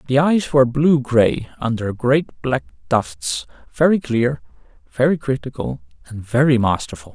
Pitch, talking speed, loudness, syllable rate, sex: 125 Hz, 135 wpm, -19 LUFS, 4.4 syllables/s, male